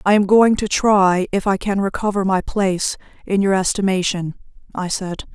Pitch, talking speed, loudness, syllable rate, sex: 195 Hz, 180 wpm, -18 LUFS, 4.9 syllables/s, female